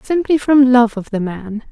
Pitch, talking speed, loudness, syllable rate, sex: 245 Hz, 210 wpm, -14 LUFS, 4.5 syllables/s, female